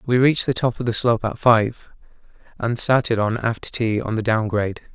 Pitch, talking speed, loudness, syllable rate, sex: 115 Hz, 220 wpm, -20 LUFS, 5.7 syllables/s, male